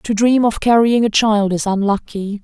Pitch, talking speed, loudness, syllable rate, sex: 215 Hz, 195 wpm, -15 LUFS, 4.6 syllables/s, female